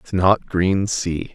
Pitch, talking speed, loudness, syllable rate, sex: 95 Hz, 135 wpm, -20 LUFS, 3.1 syllables/s, male